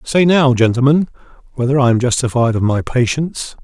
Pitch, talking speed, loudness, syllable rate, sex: 130 Hz, 165 wpm, -15 LUFS, 5.6 syllables/s, male